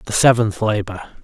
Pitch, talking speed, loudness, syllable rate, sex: 110 Hz, 145 wpm, -17 LUFS, 5.3 syllables/s, male